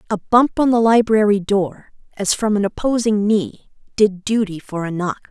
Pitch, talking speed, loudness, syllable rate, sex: 205 Hz, 180 wpm, -17 LUFS, 4.7 syllables/s, female